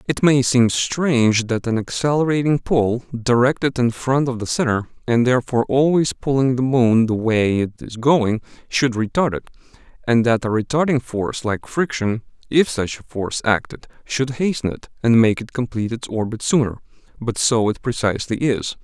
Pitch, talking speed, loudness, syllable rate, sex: 125 Hz, 175 wpm, -19 LUFS, 5.1 syllables/s, male